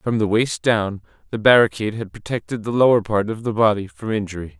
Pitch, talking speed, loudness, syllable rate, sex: 105 Hz, 210 wpm, -19 LUFS, 5.9 syllables/s, male